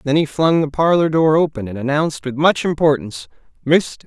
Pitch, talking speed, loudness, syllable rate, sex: 150 Hz, 190 wpm, -17 LUFS, 4.8 syllables/s, male